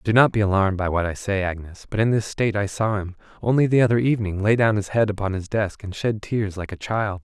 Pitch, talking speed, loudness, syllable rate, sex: 105 Hz, 275 wpm, -22 LUFS, 6.2 syllables/s, male